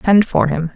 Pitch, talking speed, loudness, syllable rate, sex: 175 Hz, 240 wpm, -15 LUFS, 4.7 syllables/s, female